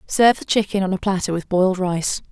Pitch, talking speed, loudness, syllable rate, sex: 190 Hz, 235 wpm, -19 LUFS, 6.1 syllables/s, female